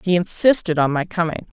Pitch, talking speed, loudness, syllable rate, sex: 175 Hz, 190 wpm, -19 LUFS, 5.6 syllables/s, female